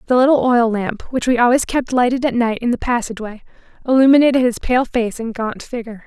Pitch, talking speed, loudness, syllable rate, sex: 240 Hz, 210 wpm, -17 LUFS, 6.1 syllables/s, female